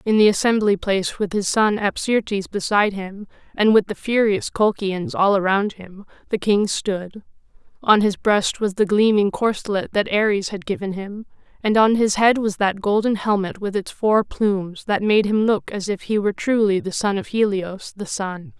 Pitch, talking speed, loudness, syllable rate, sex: 205 Hz, 195 wpm, -20 LUFS, 4.7 syllables/s, female